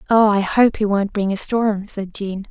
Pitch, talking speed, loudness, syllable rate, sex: 205 Hz, 240 wpm, -19 LUFS, 4.4 syllables/s, female